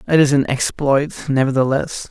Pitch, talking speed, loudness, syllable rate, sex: 135 Hz, 140 wpm, -17 LUFS, 5.1 syllables/s, male